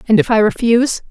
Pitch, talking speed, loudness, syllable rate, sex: 225 Hz, 220 wpm, -14 LUFS, 6.5 syllables/s, female